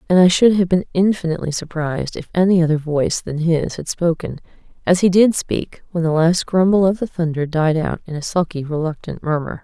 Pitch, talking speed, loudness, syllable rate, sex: 170 Hz, 200 wpm, -18 LUFS, 5.6 syllables/s, female